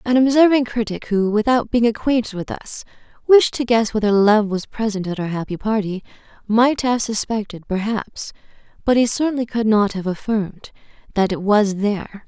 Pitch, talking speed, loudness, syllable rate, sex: 220 Hz, 170 wpm, -19 LUFS, 5.1 syllables/s, female